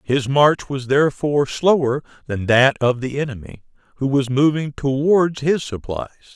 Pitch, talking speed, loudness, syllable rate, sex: 135 Hz, 150 wpm, -19 LUFS, 4.6 syllables/s, male